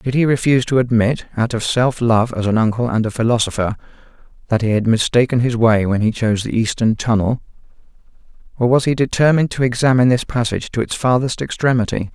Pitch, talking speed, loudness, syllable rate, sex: 120 Hz, 195 wpm, -17 LUFS, 6.2 syllables/s, male